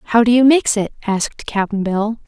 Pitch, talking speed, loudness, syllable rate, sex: 220 Hz, 210 wpm, -16 LUFS, 4.4 syllables/s, female